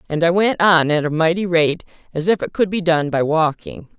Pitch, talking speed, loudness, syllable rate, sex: 170 Hz, 240 wpm, -17 LUFS, 5.2 syllables/s, female